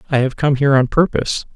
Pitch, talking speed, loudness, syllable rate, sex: 140 Hz, 230 wpm, -16 LUFS, 7.1 syllables/s, male